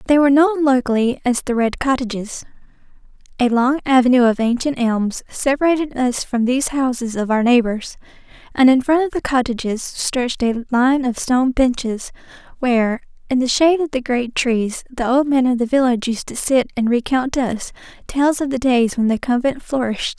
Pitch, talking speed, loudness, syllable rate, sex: 250 Hz, 185 wpm, -18 LUFS, 5.3 syllables/s, female